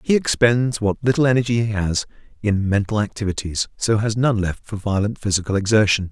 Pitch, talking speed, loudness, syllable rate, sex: 105 Hz, 175 wpm, -20 LUFS, 5.6 syllables/s, male